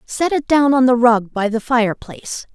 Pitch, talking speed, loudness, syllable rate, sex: 245 Hz, 235 wpm, -16 LUFS, 4.7 syllables/s, female